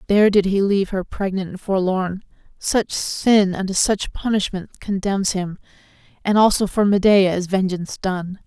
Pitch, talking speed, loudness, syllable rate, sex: 195 Hz, 155 wpm, -19 LUFS, 4.7 syllables/s, female